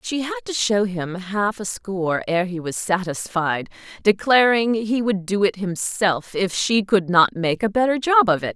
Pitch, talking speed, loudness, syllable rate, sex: 200 Hz, 195 wpm, -20 LUFS, 4.4 syllables/s, female